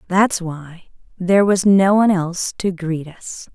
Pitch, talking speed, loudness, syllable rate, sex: 180 Hz, 170 wpm, -17 LUFS, 4.3 syllables/s, female